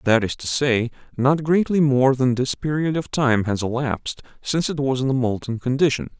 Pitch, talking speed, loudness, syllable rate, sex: 130 Hz, 205 wpm, -21 LUFS, 5.2 syllables/s, male